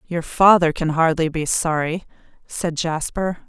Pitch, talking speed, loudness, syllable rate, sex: 165 Hz, 140 wpm, -19 LUFS, 4.1 syllables/s, female